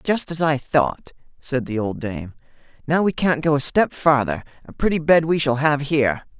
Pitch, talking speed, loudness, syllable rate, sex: 145 Hz, 205 wpm, -20 LUFS, 4.8 syllables/s, male